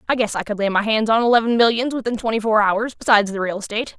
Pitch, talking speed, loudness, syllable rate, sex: 220 Hz, 270 wpm, -19 LUFS, 7.1 syllables/s, female